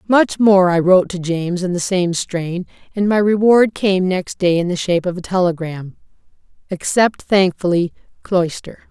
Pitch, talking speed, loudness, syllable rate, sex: 185 Hz, 160 wpm, -16 LUFS, 4.8 syllables/s, female